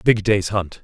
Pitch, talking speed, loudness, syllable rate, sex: 100 Hz, 215 wpm, -19 LUFS, 4.1 syllables/s, male